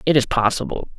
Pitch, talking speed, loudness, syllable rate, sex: 130 Hz, 180 wpm, -20 LUFS, 6.3 syllables/s, male